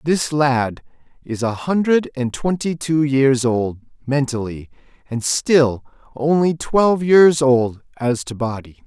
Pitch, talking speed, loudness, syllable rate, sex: 135 Hz, 135 wpm, -18 LUFS, 3.7 syllables/s, male